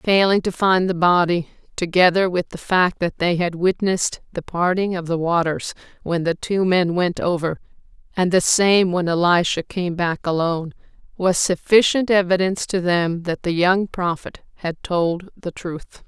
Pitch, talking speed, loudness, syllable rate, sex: 180 Hz, 170 wpm, -19 LUFS, 4.6 syllables/s, female